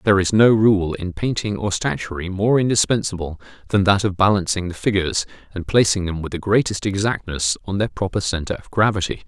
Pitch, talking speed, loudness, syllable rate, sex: 95 Hz, 190 wpm, -20 LUFS, 5.8 syllables/s, male